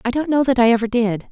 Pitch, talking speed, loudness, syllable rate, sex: 245 Hz, 320 wpm, -17 LUFS, 6.8 syllables/s, female